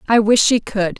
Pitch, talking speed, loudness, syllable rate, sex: 215 Hz, 240 wpm, -15 LUFS, 4.8 syllables/s, female